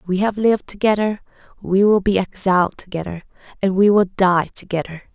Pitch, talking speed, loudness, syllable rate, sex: 190 Hz, 165 wpm, -18 LUFS, 5.6 syllables/s, female